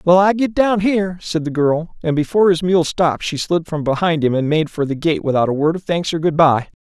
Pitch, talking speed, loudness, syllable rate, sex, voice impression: 165 Hz, 270 wpm, -17 LUFS, 5.7 syllables/s, male, masculine, very adult-like, thick, slightly relaxed, powerful, bright, soft, slightly clear, fluent, cool, intellectual, very refreshing, very sincere, calm, mature, friendly, reassuring, slightly unique, elegant, slightly wild, sweet, lively, kind, slightly modest